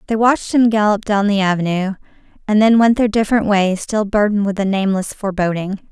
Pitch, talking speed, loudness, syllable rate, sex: 205 Hz, 195 wpm, -16 LUFS, 6.1 syllables/s, female